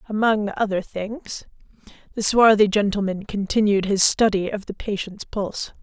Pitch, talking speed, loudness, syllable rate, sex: 205 Hz, 135 wpm, -21 LUFS, 4.8 syllables/s, female